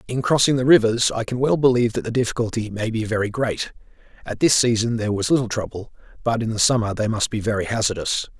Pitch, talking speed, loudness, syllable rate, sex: 115 Hz, 220 wpm, -20 LUFS, 6.4 syllables/s, male